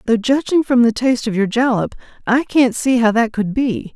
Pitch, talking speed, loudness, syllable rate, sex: 240 Hz, 230 wpm, -16 LUFS, 5.2 syllables/s, female